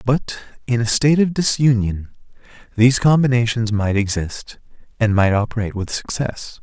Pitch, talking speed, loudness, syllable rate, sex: 115 Hz, 135 wpm, -18 LUFS, 5.0 syllables/s, male